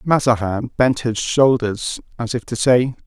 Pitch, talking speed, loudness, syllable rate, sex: 120 Hz, 155 wpm, -18 LUFS, 4.1 syllables/s, male